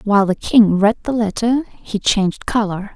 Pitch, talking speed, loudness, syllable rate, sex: 210 Hz, 185 wpm, -17 LUFS, 4.9 syllables/s, female